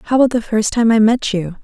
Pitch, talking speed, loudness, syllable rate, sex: 220 Hz, 295 wpm, -15 LUFS, 5.8 syllables/s, female